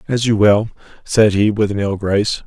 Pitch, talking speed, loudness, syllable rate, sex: 105 Hz, 220 wpm, -15 LUFS, 5.1 syllables/s, male